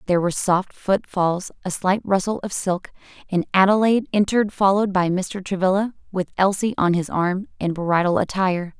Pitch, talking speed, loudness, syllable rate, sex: 190 Hz, 170 wpm, -21 LUFS, 5.4 syllables/s, female